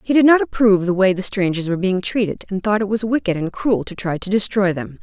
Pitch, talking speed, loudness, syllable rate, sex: 200 Hz, 275 wpm, -18 LUFS, 6.3 syllables/s, female